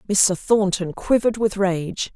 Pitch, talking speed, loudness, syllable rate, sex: 195 Hz, 140 wpm, -20 LUFS, 4.1 syllables/s, female